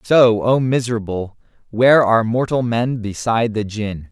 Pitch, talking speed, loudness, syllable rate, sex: 115 Hz, 145 wpm, -17 LUFS, 4.9 syllables/s, male